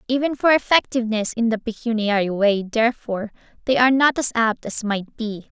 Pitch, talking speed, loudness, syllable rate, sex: 230 Hz, 170 wpm, -20 LUFS, 5.7 syllables/s, female